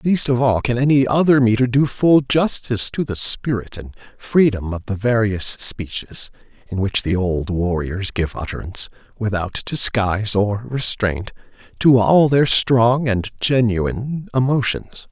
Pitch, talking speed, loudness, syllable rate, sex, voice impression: 115 Hz, 145 wpm, -18 LUFS, 4.3 syllables/s, male, masculine, middle-aged, thick, tensed, powerful, hard, slightly halting, raspy, intellectual, mature, slightly friendly, unique, wild, lively, slightly strict